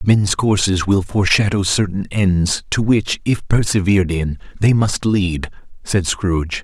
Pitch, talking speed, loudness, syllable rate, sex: 95 Hz, 145 wpm, -17 LUFS, 4.2 syllables/s, male